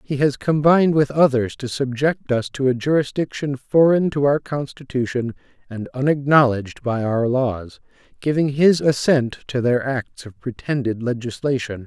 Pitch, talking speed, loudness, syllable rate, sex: 130 Hz, 145 wpm, -20 LUFS, 4.7 syllables/s, male